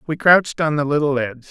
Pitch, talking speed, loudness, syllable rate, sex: 145 Hz, 240 wpm, -17 LUFS, 6.7 syllables/s, male